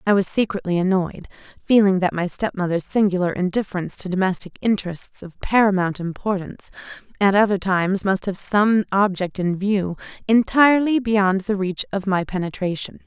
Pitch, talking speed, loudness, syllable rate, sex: 195 Hz, 145 wpm, -20 LUFS, 5.3 syllables/s, female